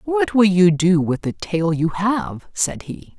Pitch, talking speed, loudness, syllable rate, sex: 185 Hz, 205 wpm, -18 LUFS, 3.6 syllables/s, female